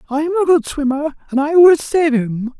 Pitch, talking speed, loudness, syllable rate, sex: 285 Hz, 230 wpm, -15 LUFS, 5.9 syllables/s, male